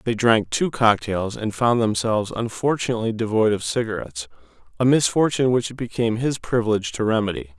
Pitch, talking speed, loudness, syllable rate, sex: 115 Hz, 160 wpm, -21 LUFS, 6.1 syllables/s, male